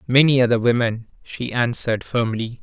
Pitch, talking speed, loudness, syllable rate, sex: 120 Hz, 135 wpm, -19 LUFS, 5.2 syllables/s, male